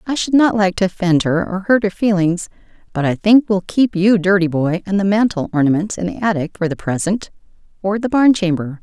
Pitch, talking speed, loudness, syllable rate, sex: 195 Hz, 225 wpm, -16 LUFS, 5.5 syllables/s, female